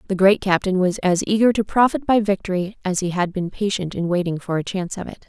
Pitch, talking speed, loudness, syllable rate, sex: 190 Hz, 250 wpm, -20 LUFS, 6.1 syllables/s, female